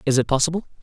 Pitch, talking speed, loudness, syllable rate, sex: 150 Hz, 220 wpm, -21 LUFS, 8.6 syllables/s, male